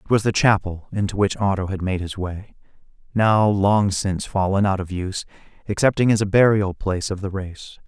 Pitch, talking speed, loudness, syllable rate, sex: 100 Hz, 200 wpm, -21 LUFS, 5.4 syllables/s, male